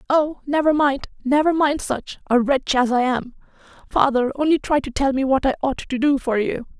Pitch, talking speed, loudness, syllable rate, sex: 275 Hz, 210 wpm, -20 LUFS, 5.1 syllables/s, female